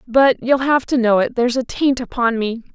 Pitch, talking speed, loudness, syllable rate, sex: 245 Hz, 220 wpm, -17 LUFS, 5.1 syllables/s, female